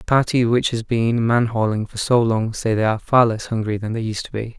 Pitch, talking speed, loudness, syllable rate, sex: 115 Hz, 275 wpm, -19 LUFS, 5.7 syllables/s, male